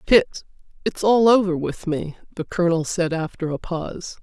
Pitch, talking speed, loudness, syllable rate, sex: 175 Hz, 170 wpm, -21 LUFS, 4.9 syllables/s, female